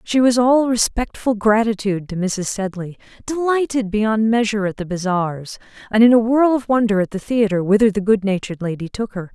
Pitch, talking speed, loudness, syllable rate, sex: 215 Hz, 185 wpm, -18 LUFS, 5.4 syllables/s, female